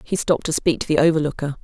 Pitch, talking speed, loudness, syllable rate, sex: 160 Hz, 260 wpm, -20 LUFS, 7.3 syllables/s, female